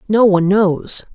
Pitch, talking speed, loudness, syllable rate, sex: 195 Hz, 160 wpm, -14 LUFS, 4.3 syllables/s, female